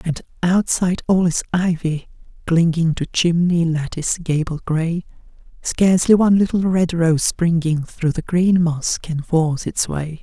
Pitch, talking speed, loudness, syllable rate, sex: 170 Hz, 145 wpm, -18 LUFS, 4.4 syllables/s, female